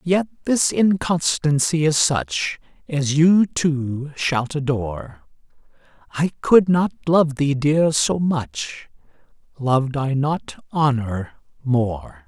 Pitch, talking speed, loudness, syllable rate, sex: 145 Hz, 110 wpm, -20 LUFS, 3.2 syllables/s, male